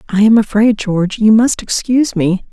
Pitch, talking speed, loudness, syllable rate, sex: 215 Hz, 190 wpm, -12 LUFS, 5.2 syllables/s, female